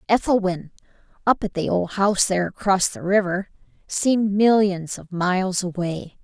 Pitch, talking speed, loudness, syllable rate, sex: 190 Hz, 145 wpm, -21 LUFS, 4.9 syllables/s, female